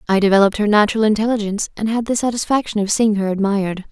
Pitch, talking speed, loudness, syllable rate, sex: 210 Hz, 200 wpm, -17 LUFS, 7.4 syllables/s, female